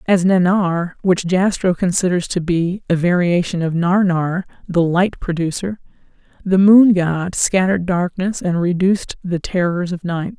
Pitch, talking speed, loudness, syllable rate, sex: 180 Hz, 145 wpm, -17 LUFS, 4.3 syllables/s, female